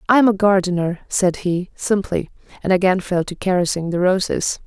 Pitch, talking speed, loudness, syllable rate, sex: 185 Hz, 180 wpm, -19 LUFS, 5.5 syllables/s, female